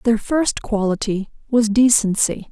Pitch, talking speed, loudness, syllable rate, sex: 220 Hz, 120 wpm, -18 LUFS, 4.1 syllables/s, female